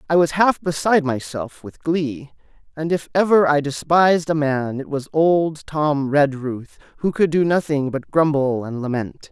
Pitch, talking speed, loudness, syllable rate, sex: 150 Hz, 175 wpm, -19 LUFS, 4.4 syllables/s, male